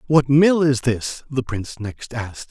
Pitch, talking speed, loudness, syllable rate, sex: 130 Hz, 190 wpm, -20 LUFS, 4.5 syllables/s, male